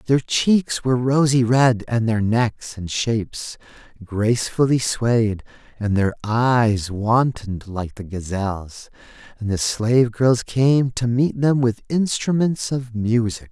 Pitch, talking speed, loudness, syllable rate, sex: 120 Hz, 140 wpm, -20 LUFS, 3.8 syllables/s, male